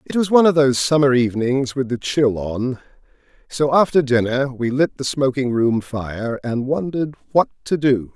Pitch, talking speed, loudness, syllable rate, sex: 130 Hz, 185 wpm, -19 LUFS, 5.0 syllables/s, male